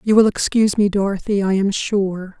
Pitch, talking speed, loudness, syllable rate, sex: 200 Hz, 200 wpm, -18 LUFS, 5.2 syllables/s, female